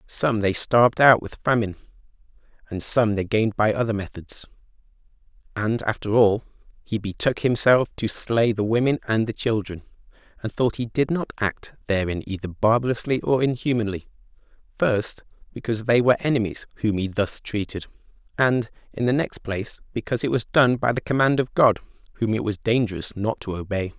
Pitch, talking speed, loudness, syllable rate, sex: 115 Hz, 170 wpm, -22 LUFS, 5.5 syllables/s, male